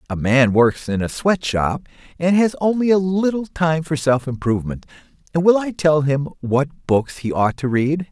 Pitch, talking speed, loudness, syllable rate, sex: 150 Hz, 190 wpm, -19 LUFS, 4.6 syllables/s, male